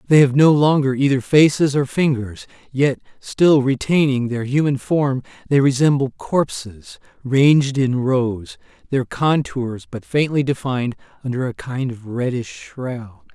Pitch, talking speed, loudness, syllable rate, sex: 135 Hz, 140 wpm, -18 LUFS, 4.2 syllables/s, male